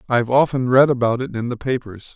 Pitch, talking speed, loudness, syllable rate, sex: 125 Hz, 225 wpm, -18 LUFS, 6.1 syllables/s, male